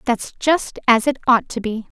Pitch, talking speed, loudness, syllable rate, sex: 240 Hz, 210 wpm, -18 LUFS, 4.6 syllables/s, female